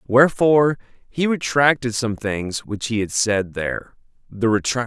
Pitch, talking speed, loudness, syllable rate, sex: 120 Hz, 135 wpm, -20 LUFS, 4.2 syllables/s, male